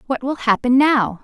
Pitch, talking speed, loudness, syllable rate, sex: 250 Hz, 195 wpm, -17 LUFS, 4.7 syllables/s, female